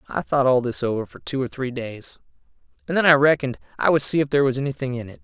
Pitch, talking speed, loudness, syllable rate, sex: 125 Hz, 265 wpm, -21 LUFS, 7.0 syllables/s, male